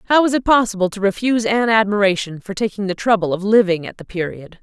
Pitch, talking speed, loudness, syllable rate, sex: 205 Hz, 220 wpm, -18 LUFS, 6.6 syllables/s, female